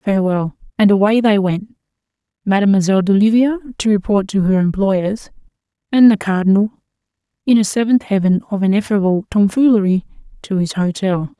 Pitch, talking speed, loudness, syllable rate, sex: 200 Hz, 125 wpm, -15 LUFS, 5.4 syllables/s, female